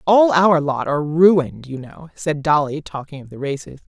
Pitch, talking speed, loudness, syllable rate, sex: 155 Hz, 200 wpm, -18 LUFS, 5.0 syllables/s, female